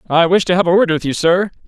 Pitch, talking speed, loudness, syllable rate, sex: 175 Hz, 325 wpm, -14 LUFS, 6.7 syllables/s, male